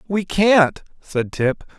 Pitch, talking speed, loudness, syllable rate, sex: 170 Hz, 135 wpm, -18 LUFS, 2.9 syllables/s, male